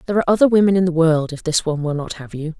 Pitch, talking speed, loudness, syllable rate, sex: 170 Hz, 325 wpm, -17 LUFS, 8.0 syllables/s, female